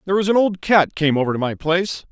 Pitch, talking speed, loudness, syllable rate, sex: 175 Hz, 285 wpm, -18 LUFS, 6.9 syllables/s, male